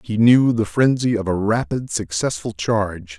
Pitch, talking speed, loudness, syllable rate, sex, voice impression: 110 Hz, 170 wpm, -19 LUFS, 4.5 syllables/s, male, very masculine, slightly old, thick, calm, wild